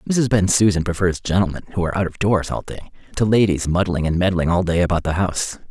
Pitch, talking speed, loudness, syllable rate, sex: 90 Hz, 220 wpm, -19 LUFS, 6.6 syllables/s, male